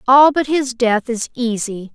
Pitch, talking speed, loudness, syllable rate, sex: 245 Hz, 185 wpm, -17 LUFS, 4.0 syllables/s, female